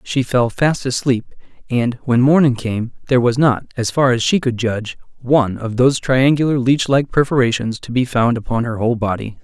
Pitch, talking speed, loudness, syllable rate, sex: 125 Hz, 195 wpm, -17 LUFS, 5.3 syllables/s, male